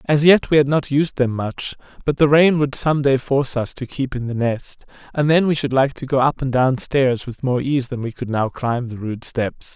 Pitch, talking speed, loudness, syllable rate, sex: 135 Hz, 265 wpm, -19 LUFS, 4.9 syllables/s, male